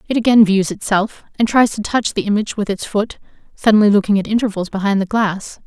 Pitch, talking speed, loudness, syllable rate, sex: 210 Hz, 210 wpm, -16 LUFS, 6.1 syllables/s, female